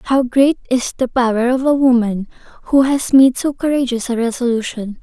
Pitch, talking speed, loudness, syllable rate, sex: 250 Hz, 180 wpm, -16 LUFS, 5.0 syllables/s, female